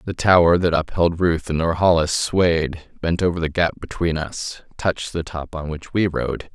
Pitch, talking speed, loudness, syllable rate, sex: 85 Hz, 190 wpm, -20 LUFS, 4.6 syllables/s, male